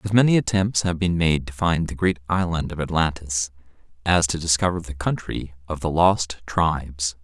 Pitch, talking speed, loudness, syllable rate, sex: 85 Hz, 180 wpm, -22 LUFS, 4.9 syllables/s, male